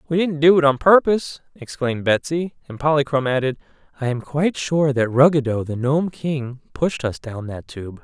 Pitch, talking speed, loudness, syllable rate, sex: 140 Hz, 185 wpm, -20 LUFS, 5.2 syllables/s, male